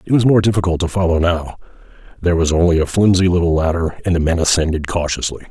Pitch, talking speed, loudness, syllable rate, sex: 85 Hz, 205 wpm, -16 LUFS, 6.6 syllables/s, male